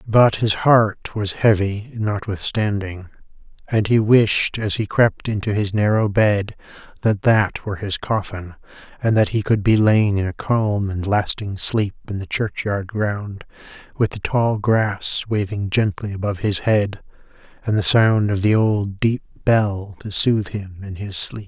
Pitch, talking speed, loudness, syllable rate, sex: 105 Hz, 170 wpm, -19 LUFS, 4.1 syllables/s, male